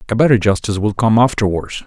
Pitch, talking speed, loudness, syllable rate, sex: 110 Hz, 195 wpm, -15 LUFS, 6.5 syllables/s, male